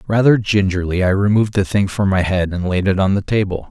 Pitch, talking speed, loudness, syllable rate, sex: 95 Hz, 245 wpm, -16 LUFS, 5.9 syllables/s, male